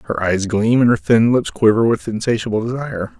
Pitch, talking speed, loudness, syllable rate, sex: 110 Hz, 205 wpm, -17 LUFS, 5.8 syllables/s, male